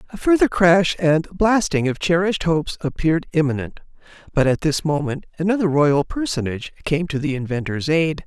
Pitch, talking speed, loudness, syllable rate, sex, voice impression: 160 Hz, 160 wpm, -20 LUFS, 5.4 syllables/s, male, masculine, adult-like, bright, slightly soft, clear, fluent, intellectual, slightly refreshing, friendly, unique, kind, light